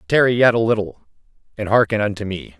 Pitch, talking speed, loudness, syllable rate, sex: 105 Hz, 185 wpm, -18 LUFS, 6.2 syllables/s, male